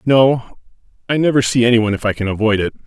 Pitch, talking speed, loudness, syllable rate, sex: 115 Hz, 190 wpm, -16 LUFS, 6.5 syllables/s, male